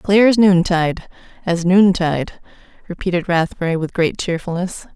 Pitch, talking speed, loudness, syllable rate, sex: 180 Hz, 110 wpm, -17 LUFS, 5.0 syllables/s, female